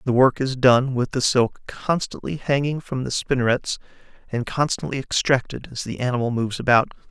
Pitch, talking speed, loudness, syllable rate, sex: 130 Hz, 170 wpm, -22 LUFS, 5.4 syllables/s, male